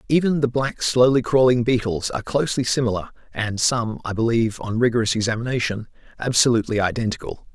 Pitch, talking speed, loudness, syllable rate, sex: 120 Hz, 145 wpm, -21 LUFS, 6.2 syllables/s, male